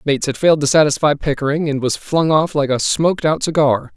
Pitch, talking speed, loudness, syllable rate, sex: 150 Hz, 225 wpm, -16 LUFS, 6.0 syllables/s, male